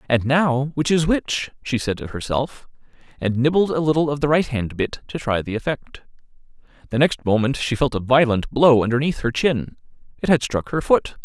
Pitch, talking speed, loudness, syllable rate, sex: 135 Hz, 200 wpm, -20 LUFS, 5.1 syllables/s, male